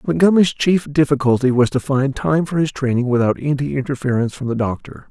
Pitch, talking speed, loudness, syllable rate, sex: 135 Hz, 190 wpm, -18 LUFS, 6.1 syllables/s, male